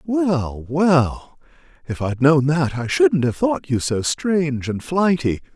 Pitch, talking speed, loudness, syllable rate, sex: 145 Hz, 160 wpm, -19 LUFS, 3.6 syllables/s, male